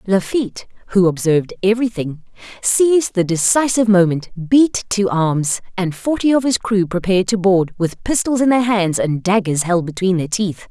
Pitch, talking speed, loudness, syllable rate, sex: 200 Hz, 175 wpm, -17 LUFS, 5.0 syllables/s, female